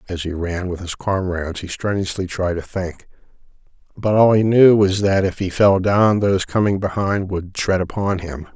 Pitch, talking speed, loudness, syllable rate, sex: 95 Hz, 195 wpm, -18 LUFS, 4.9 syllables/s, male